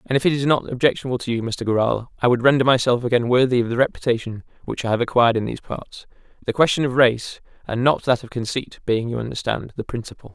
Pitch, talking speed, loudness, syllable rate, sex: 125 Hz, 230 wpm, -21 LUFS, 6.6 syllables/s, male